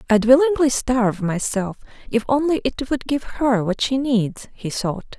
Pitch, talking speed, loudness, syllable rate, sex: 240 Hz, 175 wpm, -20 LUFS, 4.4 syllables/s, female